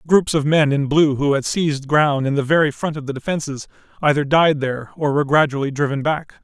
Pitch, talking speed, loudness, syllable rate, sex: 145 Hz, 225 wpm, -18 LUFS, 5.8 syllables/s, male